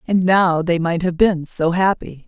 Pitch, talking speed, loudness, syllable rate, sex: 175 Hz, 210 wpm, -17 LUFS, 4.2 syllables/s, female